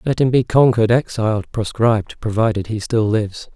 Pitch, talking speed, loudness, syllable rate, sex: 115 Hz, 170 wpm, -18 LUFS, 5.7 syllables/s, male